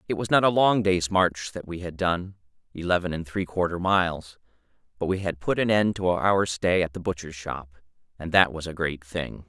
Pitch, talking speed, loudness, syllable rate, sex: 90 Hz, 220 wpm, -25 LUFS, 5.0 syllables/s, male